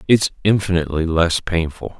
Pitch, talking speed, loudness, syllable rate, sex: 85 Hz, 120 wpm, -18 LUFS, 5.2 syllables/s, male